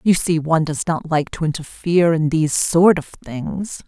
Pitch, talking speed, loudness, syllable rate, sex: 165 Hz, 200 wpm, -18 LUFS, 5.0 syllables/s, female